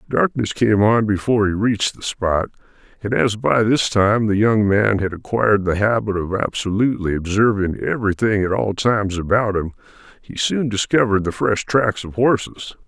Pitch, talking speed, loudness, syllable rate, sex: 105 Hz, 170 wpm, -18 LUFS, 5.1 syllables/s, male